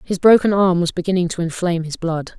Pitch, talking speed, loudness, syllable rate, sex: 175 Hz, 225 wpm, -18 LUFS, 6.2 syllables/s, female